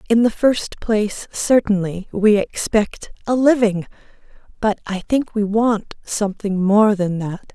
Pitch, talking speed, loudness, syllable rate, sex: 210 Hz, 145 wpm, -19 LUFS, 4.0 syllables/s, female